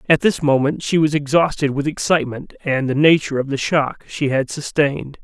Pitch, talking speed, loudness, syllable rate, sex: 145 Hz, 195 wpm, -18 LUFS, 5.4 syllables/s, male